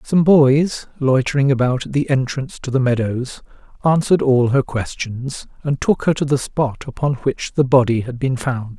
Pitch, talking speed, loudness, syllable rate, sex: 135 Hz, 185 wpm, -18 LUFS, 4.7 syllables/s, male